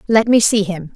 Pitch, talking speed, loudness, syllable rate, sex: 205 Hz, 250 wpm, -15 LUFS, 5.2 syllables/s, female